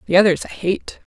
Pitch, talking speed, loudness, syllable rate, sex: 185 Hz, 210 wpm, -19 LUFS, 5.7 syllables/s, female